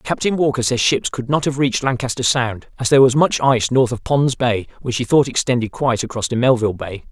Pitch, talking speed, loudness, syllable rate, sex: 125 Hz, 235 wpm, -17 LUFS, 6.0 syllables/s, male